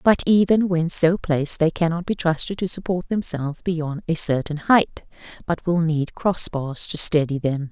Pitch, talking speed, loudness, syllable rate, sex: 165 Hz, 185 wpm, -21 LUFS, 4.6 syllables/s, female